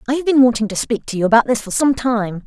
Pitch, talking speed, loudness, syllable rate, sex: 240 Hz, 315 wpm, -16 LUFS, 6.6 syllables/s, female